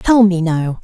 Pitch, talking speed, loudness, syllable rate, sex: 185 Hz, 215 wpm, -14 LUFS, 3.8 syllables/s, female